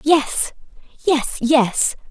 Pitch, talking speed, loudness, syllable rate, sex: 275 Hz, 85 wpm, -18 LUFS, 2.2 syllables/s, female